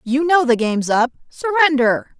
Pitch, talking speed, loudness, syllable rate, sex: 275 Hz, 165 wpm, -17 LUFS, 5.8 syllables/s, female